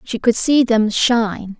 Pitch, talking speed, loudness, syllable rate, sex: 225 Hz, 190 wpm, -16 LUFS, 4.0 syllables/s, female